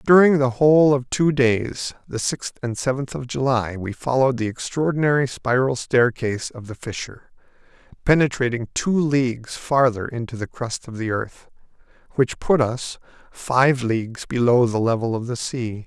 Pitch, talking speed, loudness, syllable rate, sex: 125 Hz, 160 wpm, -21 LUFS, 4.8 syllables/s, male